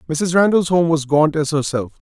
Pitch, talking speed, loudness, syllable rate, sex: 160 Hz, 200 wpm, -17 LUFS, 5.1 syllables/s, male